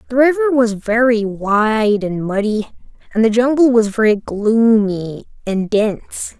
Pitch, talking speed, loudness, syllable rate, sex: 220 Hz, 140 wpm, -15 LUFS, 4.1 syllables/s, female